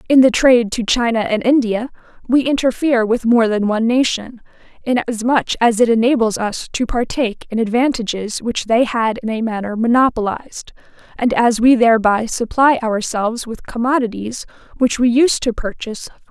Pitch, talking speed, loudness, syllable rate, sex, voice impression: 235 Hz, 165 wpm, -16 LUFS, 5.4 syllables/s, female, feminine, adult-like, slightly relaxed, powerful, soft, fluent, intellectual, calm, friendly, reassuring, kind, modest